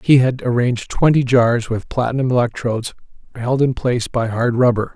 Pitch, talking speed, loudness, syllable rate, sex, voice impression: 125 Hz, 170 wpm, -17 LUFS, 5.5 syllables/s, male, masculine, middle-aged, slightly weak, raspy, calm, mature, friendly, wild, kind, slightly modest